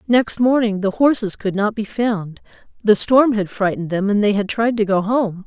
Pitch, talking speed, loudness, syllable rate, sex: 210 Hz, 220 wpm, -18 LUFS, 4.9 syllables/s, female